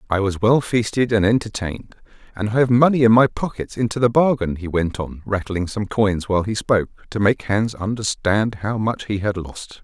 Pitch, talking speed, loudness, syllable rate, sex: 105 Hz, 210 wpm, -20 LUFS, 5.2 syllables/s, male